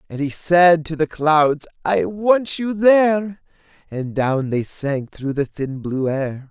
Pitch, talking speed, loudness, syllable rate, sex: 160 Hz, 175 wpm, -19 LUFS, 3.5 syllables/s, male